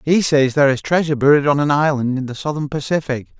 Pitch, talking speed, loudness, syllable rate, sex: 140 Hz, 230 wpm, -17 LUFS, 6.4 syllables/s, male